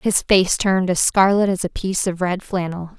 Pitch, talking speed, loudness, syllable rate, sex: 185 Hz, 220 wpm, -18 LUFS, 5.1 syllables/s, female